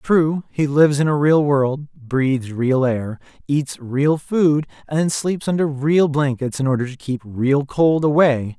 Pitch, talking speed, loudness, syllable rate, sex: 145 Hz, 175 wpm, -19 LUFS, 3.9 syllables/s, male